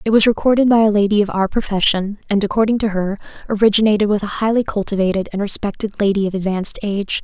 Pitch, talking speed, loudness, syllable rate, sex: 205 Hz, 200 wpm, -17 LUFS, 6.7 syllables/s, female